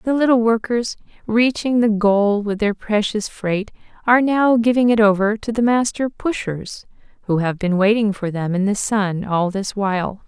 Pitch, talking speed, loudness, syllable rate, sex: 215 Hz, 180 wpm, -18 LUFS, 4.6 syllables/s, female